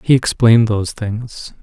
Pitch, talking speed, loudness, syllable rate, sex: 115 Hz, 150 wpm, -15 LUFS, 4.8 syllables/s, male